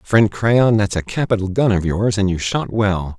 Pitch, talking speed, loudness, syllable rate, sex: 100 Hz, 225 wpm, -17 LUFS, 4.6 syllables/s, male